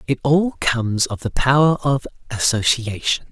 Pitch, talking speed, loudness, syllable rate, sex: 130 Hz, 145 wpm, -19 LUFS, 4.5 syllables/s, male